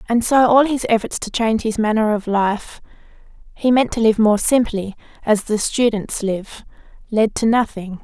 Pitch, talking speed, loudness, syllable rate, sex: 220 Hz, 180 wpm, -18 LUFS, 3.9 syllables/s, female